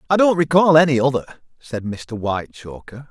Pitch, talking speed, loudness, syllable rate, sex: 140 Hz, 155 wpm, -18 LUFS, 5.2 syllables/s, male